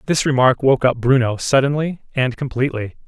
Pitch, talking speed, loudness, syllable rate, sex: 130 Hz, 155 wpm, -18 LUFS, 5.5 syllables/s, male